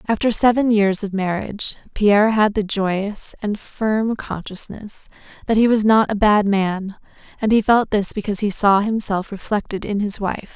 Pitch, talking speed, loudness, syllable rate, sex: 205 Hz, 175 wpm, -19 LUFS, 4.6 syllables/s, female